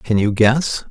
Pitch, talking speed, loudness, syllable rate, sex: 120 Hz, 200 wpm, -16 LUFS, 3.6 syllables/s, male